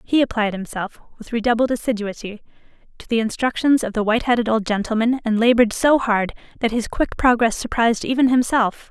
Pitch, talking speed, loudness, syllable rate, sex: 230 Hz, 175 wpm, -19 LUFS, 6.0 syllables/s, female